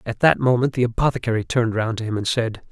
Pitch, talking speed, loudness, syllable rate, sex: 115 Hz, 245 wpm, -21 LUFS, 6.8 syllables/s, male